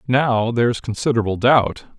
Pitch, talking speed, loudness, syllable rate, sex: 120 Hz, 120 wpm, -18 LUFS, 5.2 syllables/s, male